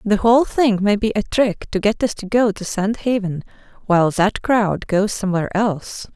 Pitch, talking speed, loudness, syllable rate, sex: 210 Hz, 205 wpm, -18 LUFS, 5.1 syllables/s, female